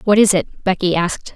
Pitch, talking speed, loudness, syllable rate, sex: 190 Hz, 220 wpm, -17 LUFS, 5.6 syllables/s, female